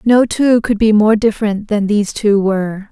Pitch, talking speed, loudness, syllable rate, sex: 210 Hz, 205 wpm, -14 LUFS, 5.0 syllables/s, female